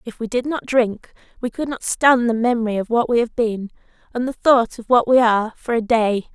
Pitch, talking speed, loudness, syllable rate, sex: 235 Hz, 245 wpm, -19 LUFS, 5.3 syllables/s, female